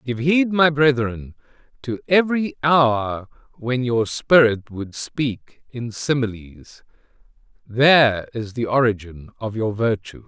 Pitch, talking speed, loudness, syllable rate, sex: 125 Hz, 125 wpm, -19 LUFS, 3.8 syllables/s, male